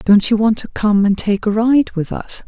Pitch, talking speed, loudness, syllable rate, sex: 215 Hz, 265 wpm, -16 LUFS, 4.7 syllables/s, female